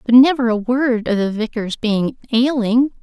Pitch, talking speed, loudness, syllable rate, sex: 235 Hz, 180 wpm, -17 LUFS, 4.5 syllables/s, female